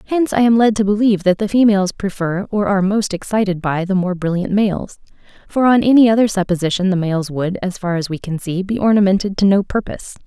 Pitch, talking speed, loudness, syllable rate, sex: 195 Hz, 220 wpm, -16 LUFS, 6.1 syllables/s, female